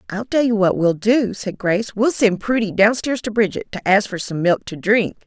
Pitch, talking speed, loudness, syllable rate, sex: 220 Hz, 250 wpm, -18 LUFS, 5.0 syllables/s, female